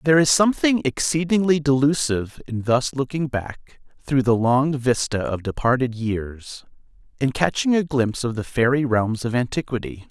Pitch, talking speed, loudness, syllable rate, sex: 130 Hz, 155 wpm, -21 LUFS, 4.9 syllables/s, male